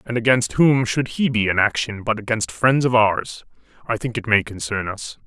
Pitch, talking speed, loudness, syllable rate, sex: 110 Hz, 215 wpm, -20 LUFS, 5.0 syllables/s, male